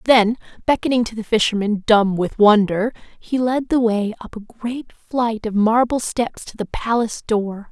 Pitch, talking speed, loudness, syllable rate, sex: 225 Hz, 180 wpm, -19 LUFS, 4.6 syllables/s, female